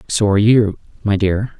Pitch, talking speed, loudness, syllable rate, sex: 105 Hz, 190 wpm, -16 LUFS, 5.1 syllables/s, male